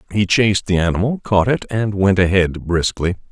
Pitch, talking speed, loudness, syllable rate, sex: 100 Hz, 180 wpm, -17 LUFS, 5.2 syllables/s, male